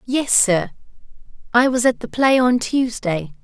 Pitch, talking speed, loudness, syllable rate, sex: 235 Hz, 155 wpm, -18 LUFS, 4.1 syllables/s, female